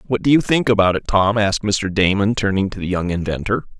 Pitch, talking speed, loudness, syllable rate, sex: 100 Hz, 235 wpm, -18 LUFS, 6.1 syllables/s, male